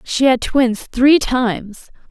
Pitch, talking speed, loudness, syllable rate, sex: 245 Hz, 145 wpm, -15 LUFS, 3.3 syllables/s, female